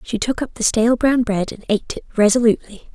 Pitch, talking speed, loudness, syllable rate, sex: 225 Hz, 225 wpm, -18 LUFS, 6.4 syllables/s, female